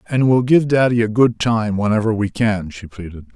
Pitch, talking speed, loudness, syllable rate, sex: 110 Hz, 215 wpm, -16 LUFS, 5.2 syllables/s, male